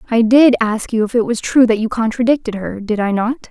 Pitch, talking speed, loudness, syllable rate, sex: 230 Hz, 255 wpm, -15 LUFS, 5.6 syllables/s, female